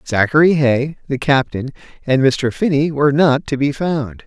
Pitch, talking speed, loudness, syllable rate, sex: 140 Hz, 170 wpm, -16 LUFS, 4.7 syllables/s, male